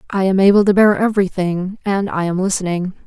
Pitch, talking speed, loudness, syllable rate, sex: 190 Hz, 195 wpm, -16 LUFS, 5.9 syllables/s, female